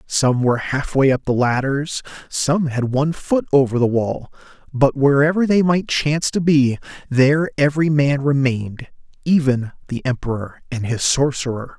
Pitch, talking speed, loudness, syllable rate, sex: 140 Hz, 160 wpm, -18 LUFS, 4.8 syllables/s, male